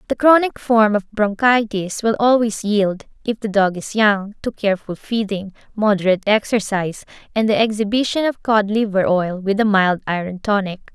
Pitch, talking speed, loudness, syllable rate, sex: 210 Hz, 165 wpm, -18 LUFS, 5.0 syllables/s, female